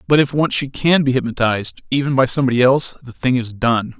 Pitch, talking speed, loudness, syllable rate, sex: 130 Hz, 195 wpm, -17 LUFS, 6.2 syllables/s, male